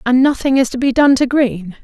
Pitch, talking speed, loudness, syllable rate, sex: 255 Hz, 260 wpm, -14 LUFS, 5.4 syllables/s, female